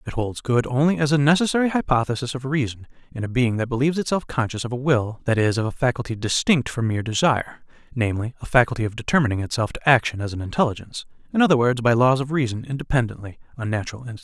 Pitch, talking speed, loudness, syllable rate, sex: 125 Hz, 215 wpm, -22 LUFS, 3.7 syllables/s, male